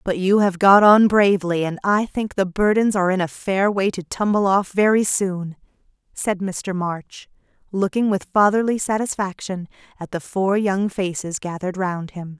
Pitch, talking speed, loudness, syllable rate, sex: 190 Hz, 175 wpm, -19 LUFS, 4.7 syllables/s, female